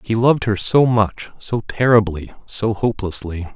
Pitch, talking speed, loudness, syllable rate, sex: 110 Hz, 150 wpm, -18 LUFS, 4.6 syllables/s, male